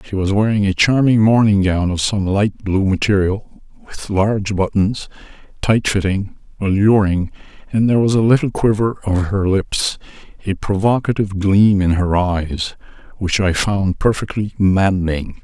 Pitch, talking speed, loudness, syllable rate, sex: 100 Hz, 150 wpm, -17 LUFS, 4.6 syllables/s, male